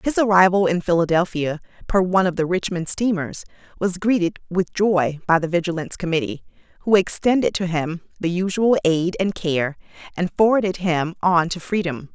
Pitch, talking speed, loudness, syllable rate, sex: 180 Hz, 165 wpm, -20 LUFS, 5.3 syllables/s, female